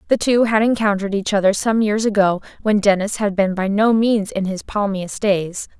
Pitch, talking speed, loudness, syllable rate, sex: 205 Hz, 205 wpm, -18 LUFS, 5.1 syllables/s, female